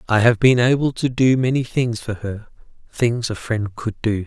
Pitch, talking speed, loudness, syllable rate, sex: 115 Hz, 210 wpm, -19 LUFS, 4.6 syllables/s, male